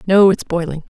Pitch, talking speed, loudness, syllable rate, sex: 175 Hz, 190 wpm, -15 LUFS, 5.5 syllables/s, female